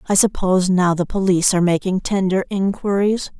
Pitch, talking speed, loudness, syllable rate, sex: 190 Hz, 160 wpm, -18 LUFS, 5.8 syllables/s, female